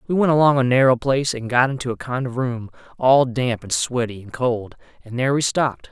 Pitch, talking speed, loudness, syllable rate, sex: 125 Hz, 235 wpm, -20 LUFS, 5.7 syllables/s, male